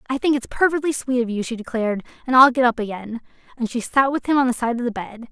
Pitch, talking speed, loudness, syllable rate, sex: 245 Hz, 280 wpm, -20 LUFS, 6.7 syllables/s, female